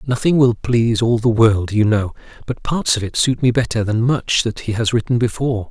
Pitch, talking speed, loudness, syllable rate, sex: 115 Hz, 230 wpm, -17 LUFS, 5.3 syllables/s, male